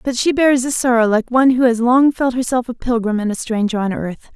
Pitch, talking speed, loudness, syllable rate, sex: 240 Hz, 260 wpm, -16 LUFS, 5.7 syllables/s, female